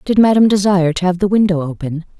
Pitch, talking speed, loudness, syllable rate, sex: 185 Hz, 220 wpm, -14 LUFS, 7.1 syllables/s, female